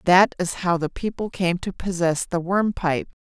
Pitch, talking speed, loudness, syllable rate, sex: 180 Hz, 205 wpm, -23 LUFS, 4.5 syllables/s, female